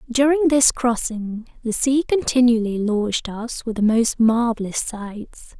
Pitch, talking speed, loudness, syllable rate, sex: 235 Hz, 140 wpm, -20 LUFS, 4.3 syllables/s, female